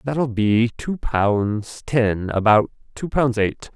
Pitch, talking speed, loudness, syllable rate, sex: 115 Hz, 145 wpm, -20 LUFS, 3.1 syllables/s, male